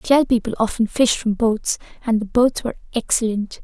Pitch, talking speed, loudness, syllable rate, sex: 230 Hz, 200 wpm, -20 LUFS, 5.5 syllables/s, female